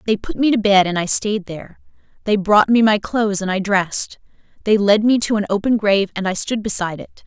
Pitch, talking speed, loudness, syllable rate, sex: 205 Hz, 240 wpm, -17 LUFS, 5.9 syllables/s, female